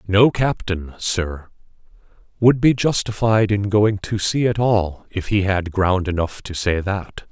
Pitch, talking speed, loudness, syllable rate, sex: 100 Hz, 165 wpm, -19 LUFS, 3.9 syllables/s, male